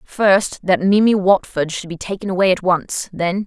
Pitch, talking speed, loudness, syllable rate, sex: 190 Hz, 175 wpm, -17 LUFS, 4.6 syllables/s, female